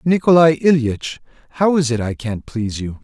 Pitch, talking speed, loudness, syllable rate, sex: 135 Hz, 180 wpm, -17 LUFS, 5.6 syllables/s, male